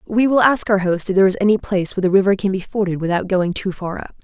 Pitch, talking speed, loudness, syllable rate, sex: 195 Hz, 300 wpm, -17 LUFS, 6.9 syllables/s, female